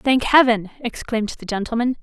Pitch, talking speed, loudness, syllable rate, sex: 235 Hz, 150 wpm, -19 LUFS, 5.4 syllables/s, female